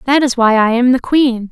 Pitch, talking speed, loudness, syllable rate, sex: 245 Hz, 280 wpm, -12 LUFS, 5.1 syllables/s, female